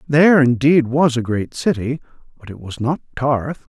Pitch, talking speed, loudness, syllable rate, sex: 135 Hz, 175 wpm, -17 LUFS, 4.7 syllables/s, male